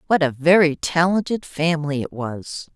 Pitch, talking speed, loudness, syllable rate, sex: 155 Hz, 155 wpm, -20 LUFS, 4.8 syllables/s, female